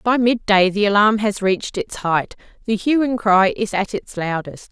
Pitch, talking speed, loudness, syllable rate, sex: 215 Hz, 190 wpm, -18 LUFS, 4.6 syllables/s, female